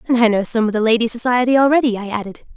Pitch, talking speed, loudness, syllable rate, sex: 230 Hz, 260 wpm, -16 LUFS, 7.3 syllables/s, female